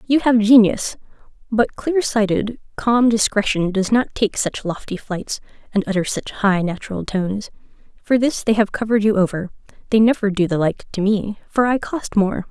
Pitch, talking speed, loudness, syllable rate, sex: 215 Hz, 175 wpm, -19 LUFS, 4.9 syllables/s, female